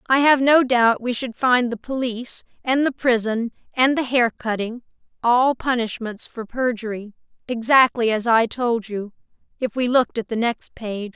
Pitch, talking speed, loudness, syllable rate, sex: 240 Hz, 160 wpm, -20 LUFS, 4.6 syllables/s, female